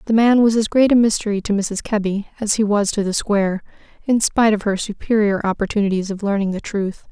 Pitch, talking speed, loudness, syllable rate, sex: 210 Hz, 220 wpm, -18 LUFS, 6.0 syllables/s, female